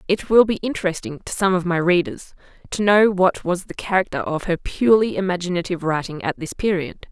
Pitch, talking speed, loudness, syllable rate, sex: 180 Hz, 195 wpm, -20 LUFS, 5.8 syllables/s, female